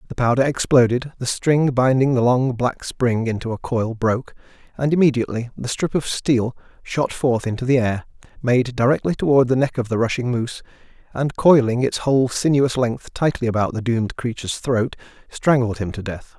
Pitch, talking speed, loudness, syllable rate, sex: 125 Hz, 185 wpm, -20 LUFS, 5.3 syllables/s, male